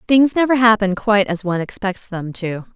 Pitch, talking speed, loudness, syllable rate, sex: 210 Hz, 195 wpm, -17 LUFS, 5.5 syllables/s, female